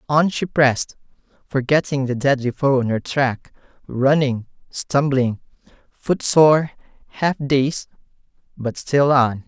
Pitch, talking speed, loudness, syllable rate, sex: 135 Hz, 120 wpm, -19 LUFS, 3.8 syllables/s, male